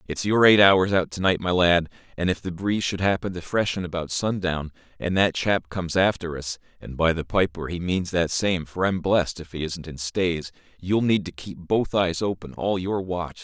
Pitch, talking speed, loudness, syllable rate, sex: 90 Hz, 220 wpm, -23 LUFS, 4.9 syllables/s, male